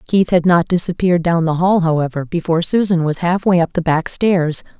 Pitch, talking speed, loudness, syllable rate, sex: 170 Hz, 200 wpm, -16 LUFS, 5.5 syllables/s, female